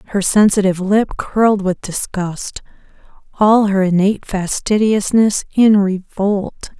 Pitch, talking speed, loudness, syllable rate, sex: 200 Hz, 105 wpm, -15 LUFS, 4.2 syllables/s, female